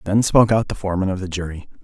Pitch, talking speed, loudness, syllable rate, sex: 95 Hz, 260 wpm, -19 LUFS, 7.6 syllables/s, male